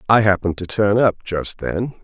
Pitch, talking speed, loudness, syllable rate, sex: 100 Hz, 205 wpm, -19 LUFS, 5.3 syllables/s, male